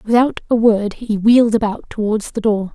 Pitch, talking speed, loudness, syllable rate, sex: 220 Hz, 195 wpm, -16 LUFS, 5.2 syllables/s, female